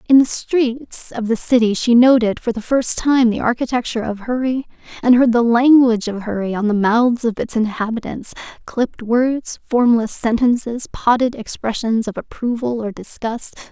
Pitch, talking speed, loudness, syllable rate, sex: 235 Hz, 160 wpm, -17 LUFS, 4.8 syllables/s, female